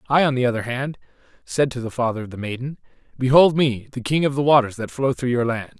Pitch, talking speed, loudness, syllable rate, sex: 130 Hz, 250 wpm, -21 LUFS, 6.1 syllables/s, male